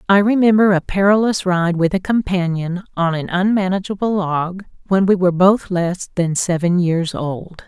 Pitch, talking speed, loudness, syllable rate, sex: 185 Hz, 165 wpm, -17 LUFS, 4.7 syllables/s, female